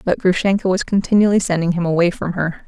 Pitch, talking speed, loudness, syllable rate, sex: 180 Hz, 200 wpm, -17 LUFS, 6.2 syllables/s, female